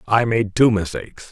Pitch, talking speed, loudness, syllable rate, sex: 110 Hz, 180 wpm, -18 LUFS, 5.3 syllables/s, male